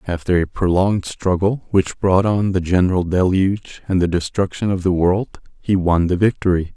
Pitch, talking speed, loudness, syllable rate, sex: 95 Hz, 180 wpm, -18 LUFS, 5.1 syllables/s, male